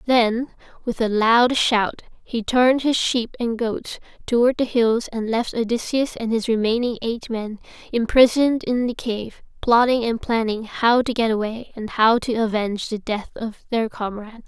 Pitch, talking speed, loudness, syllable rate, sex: 230 Hz, 175 wpm, -21 LUFS, 4.6 syllables/s, female